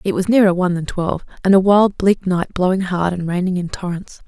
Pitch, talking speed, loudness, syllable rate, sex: 185 Hz, 240 wpm, -17 LUFS, 5.9 syllables/s, female